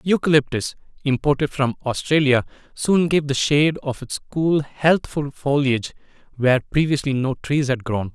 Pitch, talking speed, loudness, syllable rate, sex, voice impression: 140 Hz, 140 wpm, -20 LUFS, 4.9 syllables/s, male, masculine, middle-aged, tensed, slightly bright, clear, slightly halting, slightly calm, friendly, lively, kind, slightly modest